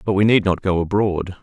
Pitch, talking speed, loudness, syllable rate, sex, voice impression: 95 Hz, 255 wpm, -18 LUFS, 5.5 syllables/s, male, very masculine, middle-aged, very thick, very tensed, very powerful, dark, soft, muffled, slightly fluent, raspy, very cool, very intellectual, sincere, very calm, very mature, very friendly, reassuring, very unique, very elegant, wild, sweet, slightly lively, kind, modest